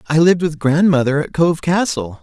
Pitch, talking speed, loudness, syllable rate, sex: 160 Hz, 190 wpm, -16 LUFS, 5.4 syllables/s, male